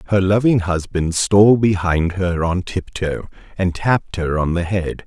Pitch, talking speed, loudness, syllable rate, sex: 90 Hz, 165 wpm, -18 LUFS, 4.4 syllables/s, male